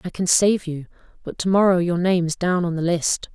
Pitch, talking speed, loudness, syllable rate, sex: 175 Hz, 250 wpm, -20 LUFS, 5.2 syllables/s, female